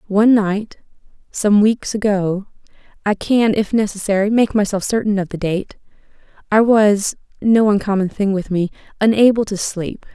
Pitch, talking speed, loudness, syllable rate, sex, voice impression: 205 Hz, 125 wpm, -17 LUFS, 4.7 syllables/s, female, feminine, adult-like, calm, slightly friendly, slightly sweet